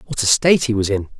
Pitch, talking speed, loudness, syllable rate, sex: 120 Hz, 305 wpm, -16 LUFS, 7.5 syllables/s, male